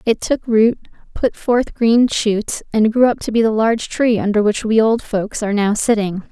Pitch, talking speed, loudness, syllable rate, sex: 220 Hz, 220 wpm, -16 LUFS, 4.7 syllables/s, female